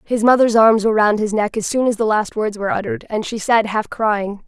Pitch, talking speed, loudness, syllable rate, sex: 215 Hz, 270 wpm, -17 LUFS, 5.7 syllables/s, female